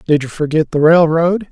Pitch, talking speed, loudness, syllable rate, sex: 160 Hz, 200 wpm, -13 LUFS, 5.1 syllables/s, male